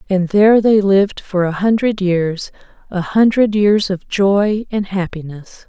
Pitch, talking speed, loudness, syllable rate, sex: 195 Hz, 160 wpm, -15 LUFS, 4.1 syllables/s, female